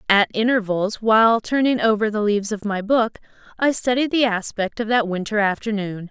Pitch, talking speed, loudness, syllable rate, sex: 215 Hz, 175 wpm, -20 LUFS, 5.3 syllables/s, female